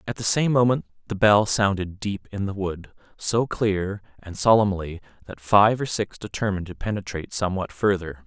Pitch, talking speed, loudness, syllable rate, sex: 100 Hz, 175 wpm, -23 LUFS, 5.2 syllables/s, male